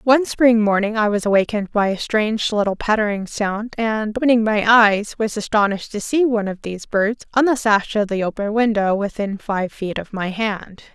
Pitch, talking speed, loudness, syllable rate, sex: 215 Hz, 205 wpm, -19 LUFS, 5.3 syllables/s, female